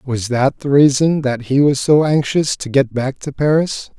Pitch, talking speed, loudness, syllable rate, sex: 135 Hz, 210 wpm, -16 LUFS, 4.4 syllables/s, male